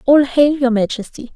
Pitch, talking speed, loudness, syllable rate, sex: 260 Hz, 175 wpm, -15 LUFS, 4.9 syllables/s, female